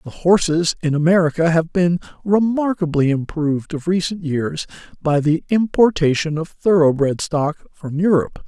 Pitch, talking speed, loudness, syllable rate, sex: 165 Hz, 135 wpm, -18 LUFS, 4.7 syllables/s, male